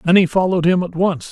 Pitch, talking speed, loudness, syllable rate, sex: 175 Hz, 225 wpm, -16 LUFS, 6.7 syllables/s, male